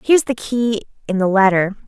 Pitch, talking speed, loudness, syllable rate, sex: 215 Hz, 190 wpm, -17 LUFS, 5.7 syllables/s, female